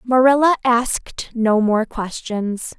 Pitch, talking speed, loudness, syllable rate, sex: 235 Hz, 110 wpm, -18 LUFS, 3.5 syllables/s, female